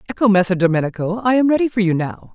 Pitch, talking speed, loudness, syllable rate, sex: 205 Hz, 230 wpm, -17 LUFS, 7.1 syllables/s, female